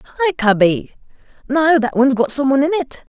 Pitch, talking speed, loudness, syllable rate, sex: 275 Hz, 190 wpm, -16 LUFS, 6.5 syllables/s, female